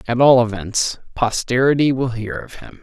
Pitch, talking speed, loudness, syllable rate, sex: 120 Hz, 170 wpm, -18 LUFS, 4.7 syllables/s, male